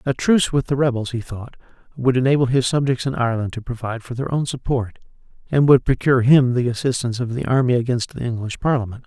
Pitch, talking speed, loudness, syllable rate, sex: 125 Hz, 210 wpm, -19 LUFS, 6.5 syllables/s, male